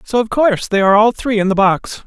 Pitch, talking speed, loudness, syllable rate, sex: 215 Hz, 290 wpm, -14 LUFS, 6.2 syllables/s, male